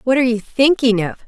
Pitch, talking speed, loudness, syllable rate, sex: 245 Hz, 235 wpm, -16 LUFS, 6.4 syllables/s, female